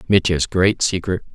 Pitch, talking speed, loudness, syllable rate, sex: 90 Hz, 135 wpm, -18 LUFS, 4.6 syllables/s, male